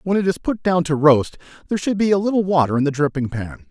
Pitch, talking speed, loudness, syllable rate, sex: 165 Hz, 275 wpm, -19 LUFS, 6.6 syllables/s, male